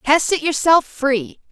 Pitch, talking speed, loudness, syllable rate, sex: 290 Hz, 120 wpm, -17 LUFS, 3.6 syllables/s, female